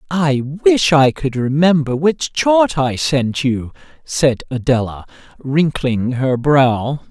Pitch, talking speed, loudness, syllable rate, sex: 145 Hz, 125 wpm, -16 LUFS, 3.3 syllables/s, male